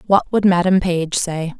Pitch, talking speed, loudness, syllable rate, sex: 180 Hz, 190 wpm, -17 LUFS, 4.4 syllables/s, female